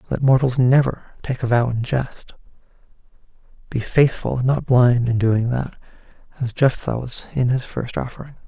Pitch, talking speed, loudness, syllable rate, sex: 125 Hz, 165 wpm, -20 LUFS, 4.8 syllables/s, male